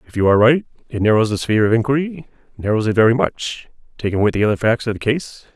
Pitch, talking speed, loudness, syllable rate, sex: 115 Hz, 225 wpm, -17 LUFS, 6.8 syllables/s, male